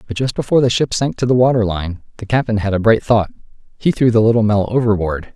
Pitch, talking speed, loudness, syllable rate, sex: 115 Hz, 245 wpm, -16 LUFS, 6.4 syllables/s, male